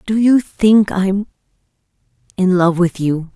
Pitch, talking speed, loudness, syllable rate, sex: 190 Hz, 125 wpm, -15 LUFS, 3.8 syllables/s, female